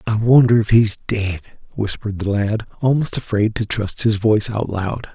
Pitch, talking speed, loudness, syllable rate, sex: 110 Hz, 185 wpm, -18 LUFS, 5.0 syllables/s, male